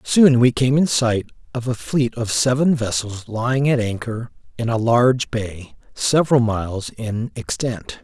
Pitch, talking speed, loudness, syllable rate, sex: 115 Hz, 165 wpm, -19 LUFS, 4.3 syllables/s, male